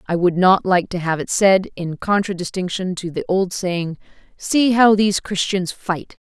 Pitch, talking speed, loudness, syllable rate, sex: 185 Hz, 180 wpm, -19 LUFS, 4.5 syllables/s, female